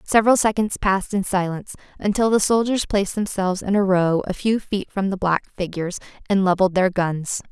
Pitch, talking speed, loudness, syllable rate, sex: 195 Hz, 190 wpm, -21 LUFS, 5.8 syllables/s, female